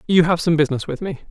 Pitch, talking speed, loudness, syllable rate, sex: 180 Hz, 275 wpm, -19 LUFS, 7.8 syllables/s, female